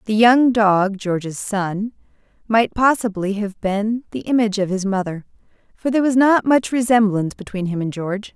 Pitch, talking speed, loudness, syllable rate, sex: 210 Hz, 170 wpm, -19 LUFS, 5.1 syllables/s, female